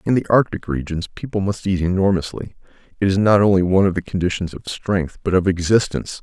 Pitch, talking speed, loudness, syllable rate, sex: 95 Hz, 200 wpm, -19 LUFS, 6.1 syllables/s, male